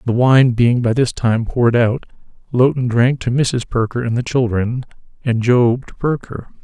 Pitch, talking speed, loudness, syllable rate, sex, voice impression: 120 Hz, 180 wpm, -16 LUFS, 4.6 syllables/s, male, very masculine, very adult-like, old, very thick, slightly relaxed, slightly powerful, slightly dark, soft, muffled, very fluent, very cool, very intellectual, sincere, very calm, very mature, friendly, very reassuring, slightly unique, very elegant, slightly wild, sweet, slightly lively, very kind, slightly modest